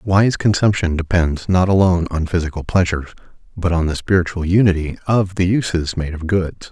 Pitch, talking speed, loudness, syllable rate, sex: 90 Hz, 170 wpm, -18 LUFS, 5.5 syllables/s, male